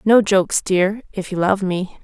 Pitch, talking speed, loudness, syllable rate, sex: 195 Hz, 205 wpm, -18 LUFS, 4.4 syllables/s, female